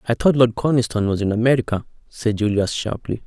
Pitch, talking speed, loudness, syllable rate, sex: 115 Hz, 185 wpm, -20 LUFS, 5.9 syllables/s, male